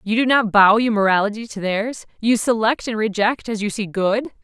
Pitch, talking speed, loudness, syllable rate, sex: 220 Hz, 205 wpm, -19 LUFS, 5.1 syllables/s, female